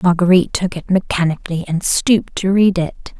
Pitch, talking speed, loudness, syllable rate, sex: 180 Hz, 170 wpm, -16 LUFS, 5.6 syllables/s, female